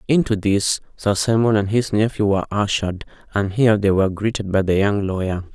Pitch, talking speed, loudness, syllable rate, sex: 105 Hz, 195 wpm, -19 LUFS, 5.8 syllables/s, male